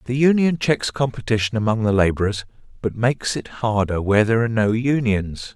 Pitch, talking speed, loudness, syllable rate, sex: 115 Hz, 175 wpm, -20 LUFS, 5.8 syllables/s, male